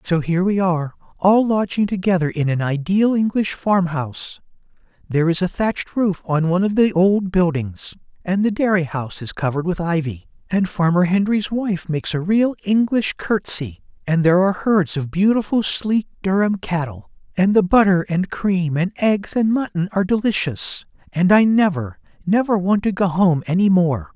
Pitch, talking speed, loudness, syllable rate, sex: 185 Hz, 175 wpm, -19 LUFS, 5.0 syllables/s, male